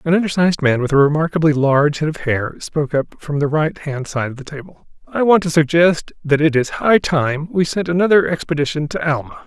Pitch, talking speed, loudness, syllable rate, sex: 155 Hz, 215 wpm, -17 LUFS, 5.7 syllables/s, male